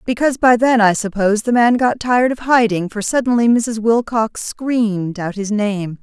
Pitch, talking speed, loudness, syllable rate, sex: 225 Hz, 190 wpm, -16 LUFS, 4.9 syllables/s, female